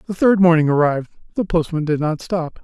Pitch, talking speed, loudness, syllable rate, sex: 165 Hz, 205 wpm, -18 LUFS, 5.9 syllables/s, male